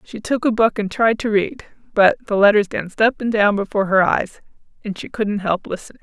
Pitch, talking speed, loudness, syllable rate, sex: 210 Hz, 230 wpm, -18 LUFS, 5.6 syllables/s, female